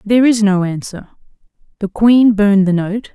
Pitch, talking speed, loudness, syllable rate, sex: 210 Hz, 170 wpm, -13 LUFS, 5.1 syllables/s, female